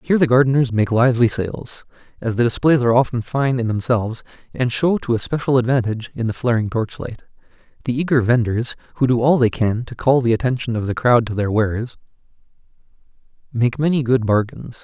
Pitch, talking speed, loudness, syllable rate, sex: 120 Hz, 185 wpm, -19 LUFS, 5.9 syllables/s, male